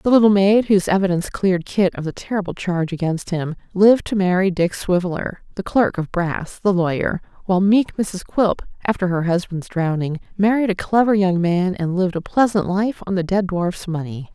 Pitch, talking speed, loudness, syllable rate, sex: 185 Hz, 195 wpm, -19 LUFS, 5.4 syllables/s, female